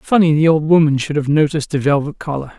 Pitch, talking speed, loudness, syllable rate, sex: 150 Hz, 230 wpm, -15 LUFS, 6.4 syllables/s, male